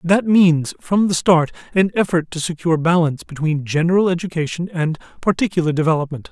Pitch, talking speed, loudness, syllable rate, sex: 170 Hz, 150 wpm, -18 LUFS, 5.8 syllables/s, male